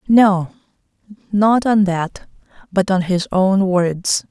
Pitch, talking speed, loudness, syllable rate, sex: 190 Hz, 125 wpm, -16 LUFS, 3.2 syllables/s, female